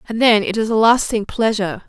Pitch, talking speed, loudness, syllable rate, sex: 220 Hz, 225 wpm, -16 LUFS, 5.9 syllables/s, female